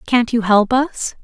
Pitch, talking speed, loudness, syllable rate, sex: 240 Hz, 195 wpm, -16 LUFS, 3.9 syllables/s, female